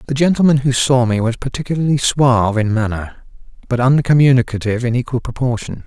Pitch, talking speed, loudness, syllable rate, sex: 125 Hz, 155 wpm, -16 LUFS, 6.3 syllables/s, male